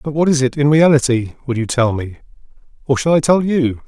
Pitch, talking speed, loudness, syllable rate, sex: 135 Hz, 230 wpm, -15 LUFS, 5.7 syllables/s, male